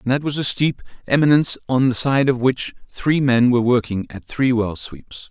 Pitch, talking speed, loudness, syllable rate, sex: 125 Hz, 205 wpm, -18 LUFS, 4.9 syllables/s, male